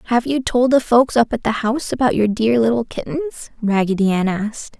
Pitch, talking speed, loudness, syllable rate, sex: 235 Hz, 215 wpm, -18 LUFS, 5.4 syllables/s, female